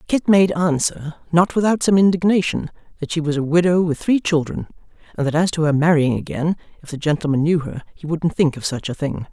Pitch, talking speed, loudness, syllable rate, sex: 165 Hz, 220 wpm, -19 LUFS, 5.7 syllables/s, female